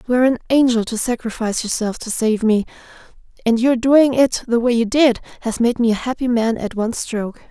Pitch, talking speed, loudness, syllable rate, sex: 235 Hz, 215 wpm, -18 LUFS, 5.9 syllables/s, female